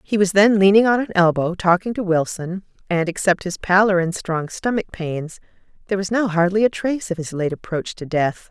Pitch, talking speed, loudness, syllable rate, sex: 185 Hz, 210 wpm, -19 LUFS, 5.4 syllables/s, female